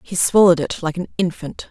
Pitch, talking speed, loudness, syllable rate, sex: 170 Hz, 210 wpm, -17 LUFS, 5.9 syllables/s, female